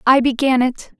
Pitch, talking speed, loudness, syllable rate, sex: 255 Hz, 180 wpm, -16 LUFS, 4.7 syllables/s, female